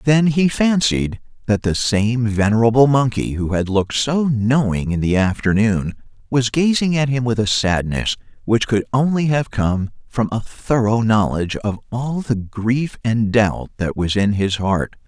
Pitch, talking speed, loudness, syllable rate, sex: 115 Hz, 170 wpm, -18 LUFS, 4.3 syllables/s, male